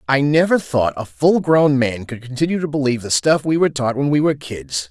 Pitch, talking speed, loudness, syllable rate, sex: 135 Hz, 245 wpm, -17 LUFS, 5.7 syllables/s, male